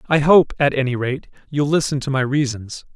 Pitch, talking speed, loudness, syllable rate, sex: 135 Hz, 205 wpm, -18 LUFS, 5.2 syllables/s, male